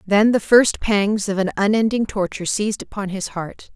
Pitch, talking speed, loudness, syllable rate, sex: 205 Hz, 190 wpm, -19 LUFS, 5.1 syllables/s, female